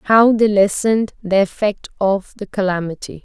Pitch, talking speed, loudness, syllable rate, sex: 200 Hz, 150 wpm, -17 LUFS, 4.8 syllables/s, female